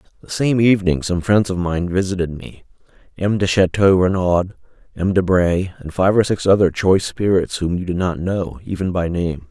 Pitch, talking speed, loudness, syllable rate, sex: 90 Hz, 185 wpm, -18 LUFS, 5.2 syllables/s, male